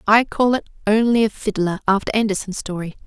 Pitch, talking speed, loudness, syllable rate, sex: 210 Hz, 175 wpm, -19 LUFS, 5.8 syllables/s, female